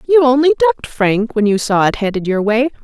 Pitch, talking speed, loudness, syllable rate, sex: 240 Hz, 235 wpm, -14 LUFS, 5.7 syllables/s, female